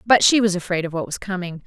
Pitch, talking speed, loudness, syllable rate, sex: 185 Hz, 290 wpm, -20 LUFS, 6.4 syllables/s, female